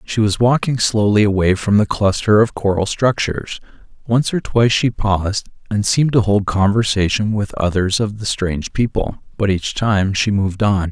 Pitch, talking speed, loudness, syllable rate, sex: 105 Hz, 180 wpm, -17 LUFS, 5.0 syllables/s, male